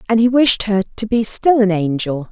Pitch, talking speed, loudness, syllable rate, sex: 210 Hz, 235 wpm, -16 LUFS, 5.0 syllables/s, female